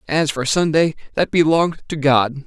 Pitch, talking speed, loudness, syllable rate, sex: 150 Hz, 170 wpm, -18 LUFS, 5.3 syllables/s, male